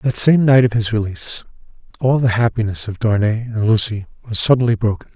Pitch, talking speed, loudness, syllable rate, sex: 110 Hz, 185 wpm, -17 LUFS, 5.8 syllables/s, male